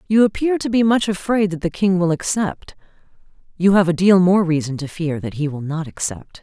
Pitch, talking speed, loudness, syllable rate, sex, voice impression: 180 Hz, 225 wpm, -18 LUFS, 5.3 syllables/s, female, feminine, middle-aged, tensed, hard, slightly muffled, slightly raspy, intellectual, calm, slightly lively, strict, sharp